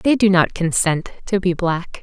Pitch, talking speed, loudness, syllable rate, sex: 185 Hz, 210 wpm, -18 LUFS, 4.3 syllables/s, female